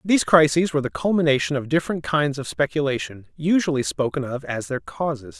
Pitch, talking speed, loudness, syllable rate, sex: 145 Hz, 180 wpm, -22 LUFS, 6.0 syllables/s, male